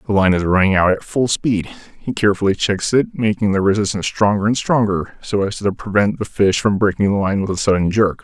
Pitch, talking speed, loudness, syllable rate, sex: 100 Hz, 235 wpm, -17 LUFS, 5.8 syllables/s, male